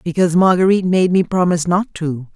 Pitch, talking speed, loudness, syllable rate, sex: 175 Hz, 180 wpm, -15 LUFS, 6.5 syllables/s, female